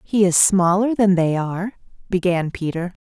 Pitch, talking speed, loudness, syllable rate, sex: 185 Hz, 160 wpm, -18 LUFS, 4.8 syllables/s, female